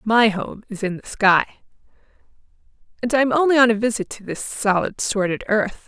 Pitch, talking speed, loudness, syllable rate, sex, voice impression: 220 Hz, 175 wpm, -20 LUFS, 4.9 syllables/s, female, feminine, adult-like, slightly relaxed, bright, soft, slightly muffled, slightly raspy, friendly, reassuring, unique, lively, kind, slightly modest